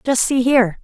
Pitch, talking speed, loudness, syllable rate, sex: 245 Hz, 215 wpm, -16 LUFS, 5.6 syllables/s, female